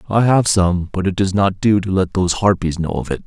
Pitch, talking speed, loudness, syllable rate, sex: 95 Hz, 275 wpm, -17 LUFS, 5.6 syllables/s, male